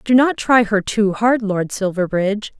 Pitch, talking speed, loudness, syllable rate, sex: 210 Hz, 185 wpm, -17 LUFS, 4.5 syllables/s, female